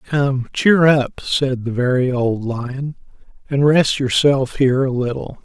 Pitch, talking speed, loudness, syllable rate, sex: 135 Hz, 155 wpm, -17 LUFS, 3.9 syllables/s, male